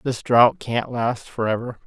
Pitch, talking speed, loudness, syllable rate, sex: 120 Hz, 195 wpm, -21 LUFS, 4.1 syllables/s, male